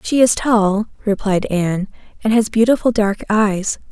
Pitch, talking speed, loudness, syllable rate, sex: 210 Hz, 155 wpm, -17 LUFS, 4.5 syllables/s, female